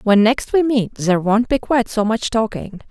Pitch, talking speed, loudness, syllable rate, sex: 225 Hz, 225 wpm, -17 LUFS, 5.1 syllables/s, female